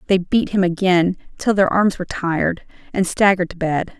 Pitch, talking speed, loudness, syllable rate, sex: 185 Hz, 195 wpm, -18 LUFS, 5.4 syllables/s, female